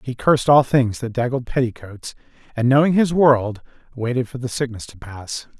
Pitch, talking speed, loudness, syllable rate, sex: 125 Hz, 180 wpm, -19 LUFS, 5.1 syllables/s, male